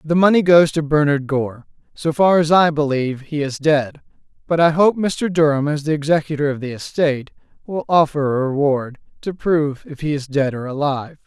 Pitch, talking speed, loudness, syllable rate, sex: 150 Hz, 195 wpm, -18 LUFS, 5.3 syllables/s, male